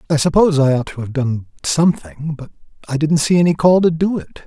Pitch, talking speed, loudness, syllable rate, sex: 150 Hz, 230 wpm, -16 LUFS, 6.2 syllables/s, male